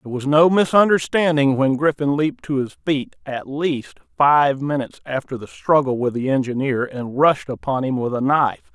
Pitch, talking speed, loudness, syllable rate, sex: 140 Hz, 185 wpm, -19 LUFS, 5.0 syllables/s, male